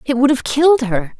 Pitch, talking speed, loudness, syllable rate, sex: 265 Hz, 250 wpm, -15 LUFS, 5.6 syllables/s, female